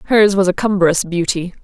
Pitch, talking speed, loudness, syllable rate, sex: 185 Hz, 185 wpm, -15 LUFS, 5.1 syllables/s, female